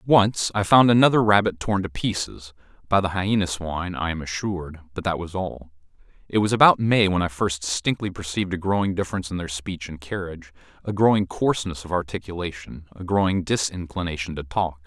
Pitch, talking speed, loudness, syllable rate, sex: 90 Hz, 180 wpm, -23 LUFS, 5.8 syllables/s, male